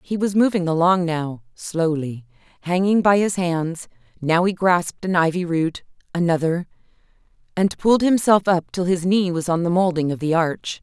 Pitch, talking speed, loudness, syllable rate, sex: 175 Hz, 155 wpm, -20 LUFS, 4.8 syllables/s, female